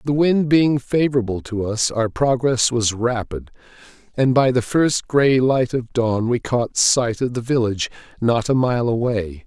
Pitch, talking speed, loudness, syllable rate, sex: 125 Hz, 175 wpm, -19 LUFS, 4.3 syllables/s, male